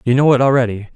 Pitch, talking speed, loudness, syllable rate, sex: 125 Hz, 255 wpm, -14 LUFS, 7.9 syllables/s, male